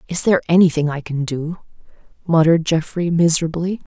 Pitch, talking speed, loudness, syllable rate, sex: 165 Hz, 135 wpm, -17 LUFS, 6.1 syllables/s, female